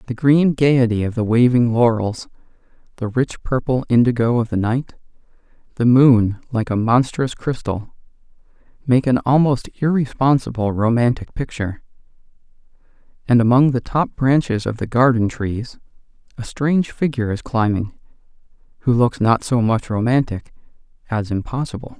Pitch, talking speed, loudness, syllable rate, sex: 120 Hz, 130 wpm, -18 LUFS, 4.9 syllables/s, male